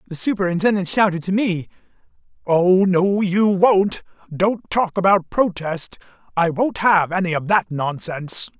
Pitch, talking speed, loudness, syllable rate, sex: 185 Hz, 140 wpm, -19 LUFS, 4.4 syllables/s, female